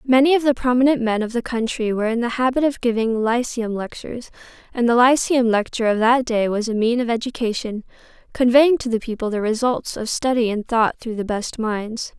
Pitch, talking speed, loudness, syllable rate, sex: 235 Hz, 205 wpm, -20 LUFS, 5.6 syllables/s, female